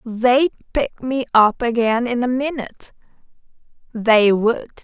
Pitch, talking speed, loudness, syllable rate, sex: 240 Hz, 125 wpm, -18 LUFS, 3.9 syllables/s, female